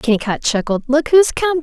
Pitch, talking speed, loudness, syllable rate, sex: 275 Hz, 185 wpm, -15 LUFS, 5.6 syllables/s, female